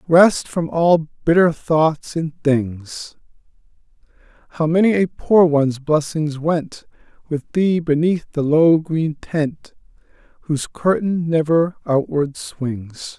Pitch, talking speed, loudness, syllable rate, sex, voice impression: 155 Hz, 120 wpm, -18 LUFS, 3.4 syllables/s, male, masculine, slightly old, muffled, slightly calm, friendly, slightly reassuring, kind